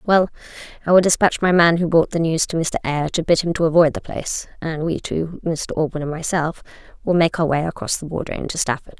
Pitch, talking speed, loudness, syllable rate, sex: 165 Hz, 240 wpm, -19 LUFS, 6.0 syllables/s, female